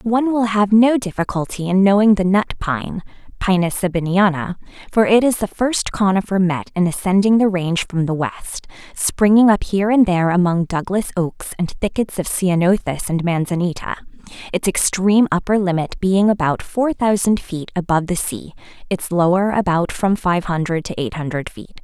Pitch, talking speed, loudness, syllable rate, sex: 190 Hz, 170 wpm, -18 LUFS, 5.0 syllables/s, female